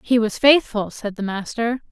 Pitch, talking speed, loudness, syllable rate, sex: 230 Hz, 190 wpm, -20 LUFS, 4.6 syllables/s, female